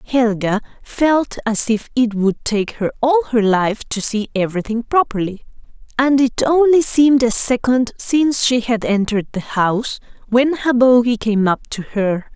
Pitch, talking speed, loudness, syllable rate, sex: 235 Hz, 160 wpm, -16 LUFS, 4.5 syllables/s, female